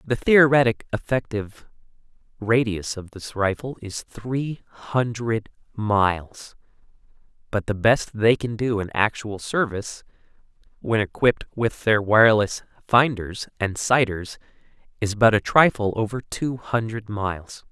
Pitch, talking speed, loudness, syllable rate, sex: 110 Hz, 120 wpm, -22 LUFS, 4.3 syllables/s, male